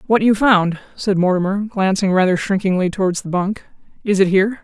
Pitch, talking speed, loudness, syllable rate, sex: 195 Hz, 180 wpm, -17 LUFS, 5.6 syllables/s, female